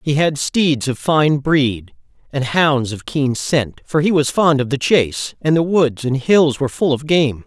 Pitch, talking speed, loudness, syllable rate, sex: 140 Hz, 215 wpm, -17 LUFS, 4.2 syllables/s, male